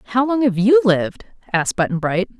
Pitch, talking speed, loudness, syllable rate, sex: 215 Hz, 200 wpm, -18 LUFS, 6.5 syllables/s, female